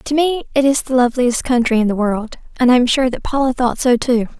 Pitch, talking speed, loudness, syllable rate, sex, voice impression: 250 Hz, 260 wpm, -16 LUFS, 5.9 syllables/s, female, very feminine, young, very thin, very tensed, powerful, very bright, hard, very clear, very fluent, slightly raspy, very cute, slightly intellectual, very refreshing, slightly sincere, slightly calm, very friendly, reassuring, very unique, elegant, slightly wild, sweet, very lively, slightly kind, intense, sharp, very light